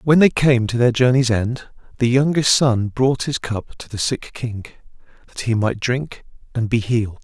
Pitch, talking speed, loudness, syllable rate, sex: 120 Hz, 200 wpm, -19 LUFS, 4.6 syllables/s, male